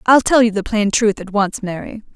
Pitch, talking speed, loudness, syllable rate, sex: 210 Hz, 250 wpm, -16 LUFS, 5.1 syllables/s, female